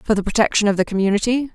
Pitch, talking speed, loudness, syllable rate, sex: 215 Hz, 235 wpm, -18 LUFS, 7.4 syllables/s, female